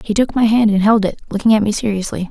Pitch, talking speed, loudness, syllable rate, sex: 215 Hz, 285 wpm, -15 LUFS, 6.8 syllables/s, female